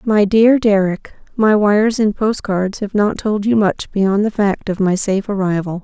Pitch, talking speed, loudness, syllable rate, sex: 205 Hz, 205 wpm, -16 LUFS, 4.6 syllables/s, female